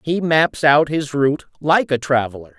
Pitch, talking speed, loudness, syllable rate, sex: 140 Hz, 185 wpm, -17 LUFS, 4.8 syllables/s, male